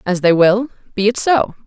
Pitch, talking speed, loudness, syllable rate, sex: 210 Hz, 215 wpm, -15 LUFS, 5.0 syllables/s, female